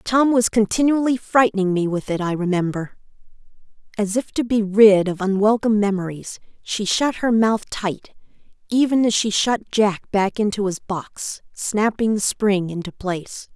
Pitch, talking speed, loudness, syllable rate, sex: 210 Hz, 160 wpm, -20 LUFS, 4.5 syllables/s, female